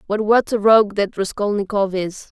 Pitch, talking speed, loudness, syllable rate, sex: 205 Hz, 175 wpm, -18 LUFS, 5.1 syllables/s, female